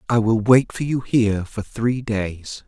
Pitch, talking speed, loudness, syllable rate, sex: 115 Hz, 200 wpm, -20 LUFS, 4.1 syllables/s, male